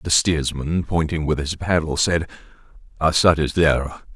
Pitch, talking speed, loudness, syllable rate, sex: 80 Hz, 145 wpm, -20 LUFS, 4.6 syllables/s, male